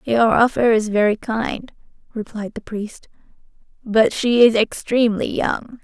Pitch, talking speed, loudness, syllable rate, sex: 225 Hz, 135 wpm, -18 LUFS, 4.1 syllables/s, female